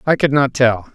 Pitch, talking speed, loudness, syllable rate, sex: 130 Hz, 255 wpm, -15 LUFS, 4.9 syllables/s, male